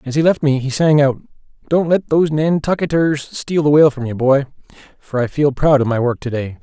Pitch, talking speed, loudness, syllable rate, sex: 140 Hz, 235 wpm, -16 LUFS, 5.7 syllables/s, male